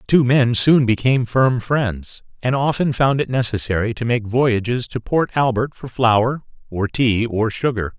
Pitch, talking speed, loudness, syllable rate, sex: 120 Hz, 180 wpm, -18 LUFS, 4.4 syllables/s, male